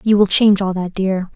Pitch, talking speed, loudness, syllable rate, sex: 195 Hz, 265 wpm, -16 LUFS, 5.6 syllables/s, female